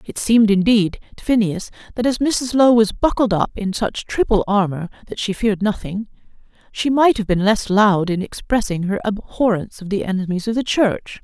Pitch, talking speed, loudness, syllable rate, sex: 210 Hz, 190 wpm, -18 LUFS, 5.2 syllables/s, female